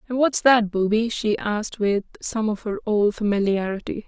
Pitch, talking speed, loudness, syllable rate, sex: 215 Hz, 175 wpm, -22 LUFS, 4.9 syllables/s, female